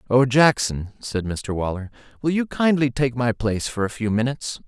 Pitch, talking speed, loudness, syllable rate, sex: 120 Hz, 190 wpm, -22 LUFS, 5.2 syllables/s, male